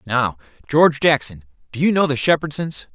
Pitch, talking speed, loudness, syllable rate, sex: 145 Hz, 165 wpm, -18 LUFS, 5.5 syllables/s, male